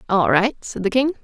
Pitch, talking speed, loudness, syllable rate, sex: 220 Hz, 245 wpm, -19 LUFS, 5.3 syllables/s, female